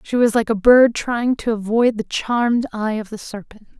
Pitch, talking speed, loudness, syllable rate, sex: 225 Hz, 220 wpm, -18 LUFS, 4.8 syllables/s, female